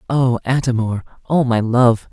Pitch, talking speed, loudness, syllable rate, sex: 125 Hz, 170 wpm, -17 LUFS, 4.3 syllables/s, male